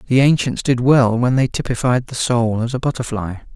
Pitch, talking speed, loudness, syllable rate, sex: 125 Hz, 200 wpm, -17 LUFS, 5.3 syllables/s, male